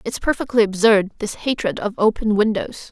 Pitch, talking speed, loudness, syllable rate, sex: 215 Hz, 165 wpm, -19 LUFS, 5.2 syllables/s, female